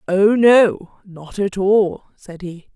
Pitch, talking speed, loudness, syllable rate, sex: 195 Hz, 155 wpm, -15 LUFS, 2.9 syllables/s, female